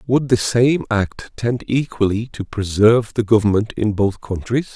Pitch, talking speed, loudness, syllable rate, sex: 110 Hz, 165 wpm, -18 LUFS, 4.5 syllables/s, male